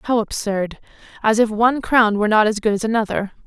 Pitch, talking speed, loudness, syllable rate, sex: 220 Hz, 190 wpm, -18 LUFS, 5.9 syllables/s, female